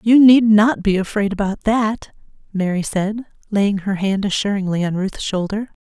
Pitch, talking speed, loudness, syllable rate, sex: 205 Hz, 165 wpm, -18 LUFS, 4.6 syllables/s, female